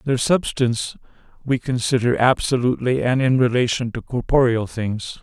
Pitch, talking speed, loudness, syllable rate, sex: 125 Hz, 125 wpm, -20 LUFS, 5.0 syllables/s, male